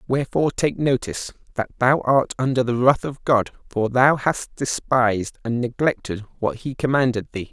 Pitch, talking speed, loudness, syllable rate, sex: 125 Hz, 170 wpm, -21 LUFS, 5.0 syllables/s, male